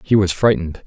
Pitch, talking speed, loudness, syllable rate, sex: 95 Hz, 210 wpm, -17 LUFS, 6.5 syllables/s, male